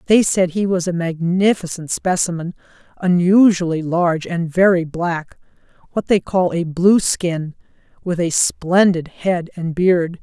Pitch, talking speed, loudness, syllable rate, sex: 175 Hz, 125 wpm, -17 LUFS, 4.1 syllables/s, female